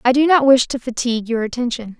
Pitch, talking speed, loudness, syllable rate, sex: 250 Hz, 240 wpm, -17 LUFS, 6.4 syllables/s, female